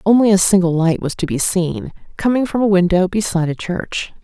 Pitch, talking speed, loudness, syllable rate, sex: 185 Hz, 215 wpm, -16 LUFS, 5.5 syllables/s, female